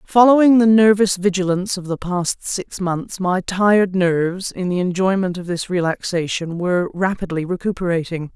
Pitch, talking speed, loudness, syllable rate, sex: 185 Hz, 150 wpm, -18 LUFS, 5.0 syllables/s, female